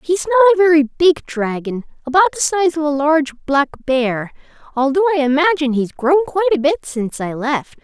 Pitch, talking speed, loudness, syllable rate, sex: 300 Hz, 190 wpm, -16 LUFS, 5.4 syllables/s, female